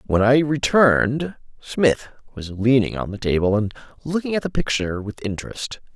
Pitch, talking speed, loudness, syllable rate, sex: 125 Hz, 160 wpm, -21 LUFS, 5.2 syllables/s, male